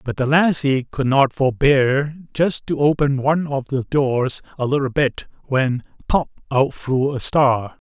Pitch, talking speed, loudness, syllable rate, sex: 135 Hz, 160 wpm, -19 LUFS, 4.0 syllables/s, male